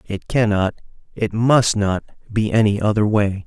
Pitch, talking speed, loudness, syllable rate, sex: 105 Hz, 155 wpm, -19 LUFS, 4.3 syllables/s, male